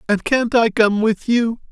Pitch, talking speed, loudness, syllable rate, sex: 225 Hz, 210 wpm, -17 LUFS, 4.1 syllables/s, male